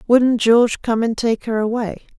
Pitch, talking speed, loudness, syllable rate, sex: 230 Hz, 190 wpm, -17 LUFS, 4.8 syllables/s, female